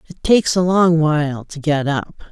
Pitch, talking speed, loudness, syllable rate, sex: 160 Hz, 210 wpm, -17 LUFS, 4.8 syllables/s, female